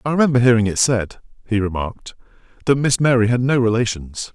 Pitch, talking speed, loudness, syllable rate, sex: 120 Hz, 180 wpm, -18 LUFS, 6.1 syllables/s, male